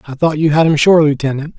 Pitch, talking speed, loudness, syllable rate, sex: 150 Hz, 265 wpm, -13 LUFS, 6.4 syllables/s, male